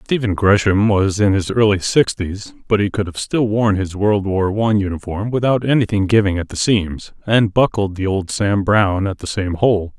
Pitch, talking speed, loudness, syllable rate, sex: 100 Hz, 205 wpm, -17 LUFS, 4.9 syllables/s, male